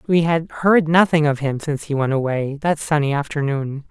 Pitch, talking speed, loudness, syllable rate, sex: 150 Hz, 200 wpm, -19 LUFS, 5.1 syllables/s, male